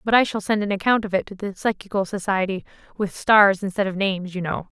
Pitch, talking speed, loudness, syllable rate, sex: 200 Hz, 240 wpm, -22 LUFS, 6.1 syllables/s, female